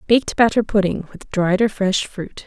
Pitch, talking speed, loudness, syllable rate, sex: 205 Hz, 195 wpm, -19 LUFS, 4.9 syllables/s, female